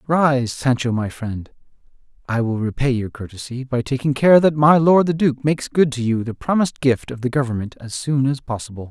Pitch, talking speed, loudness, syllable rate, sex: 130 Hz, 210 wpm, -19 LUFS, 5.4 syllables/s, male